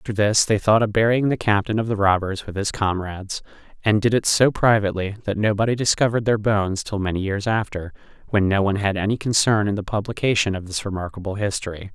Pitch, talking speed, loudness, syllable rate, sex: 105 Hz, 205 wpm, -21 LUFS, 6.3 syllables/s, male